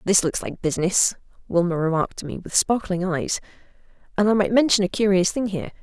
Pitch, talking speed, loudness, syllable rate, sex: 190 Hz, 195 wpm, -22 LUFS, 6.2 syllables/s, female